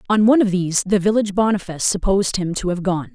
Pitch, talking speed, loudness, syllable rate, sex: 195 Hz, 230 wpm, -18 LUFS, 7.3 syllables/s, female